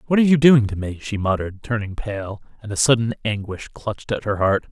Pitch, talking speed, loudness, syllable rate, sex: 110 Hz, 230 wpm, -20 LUFS, 5.9 syllables/s, male